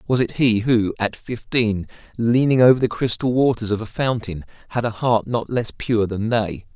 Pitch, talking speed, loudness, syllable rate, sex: 115 Hz, 195 wpm, -20 LUFS, 4.8 syllables/s, male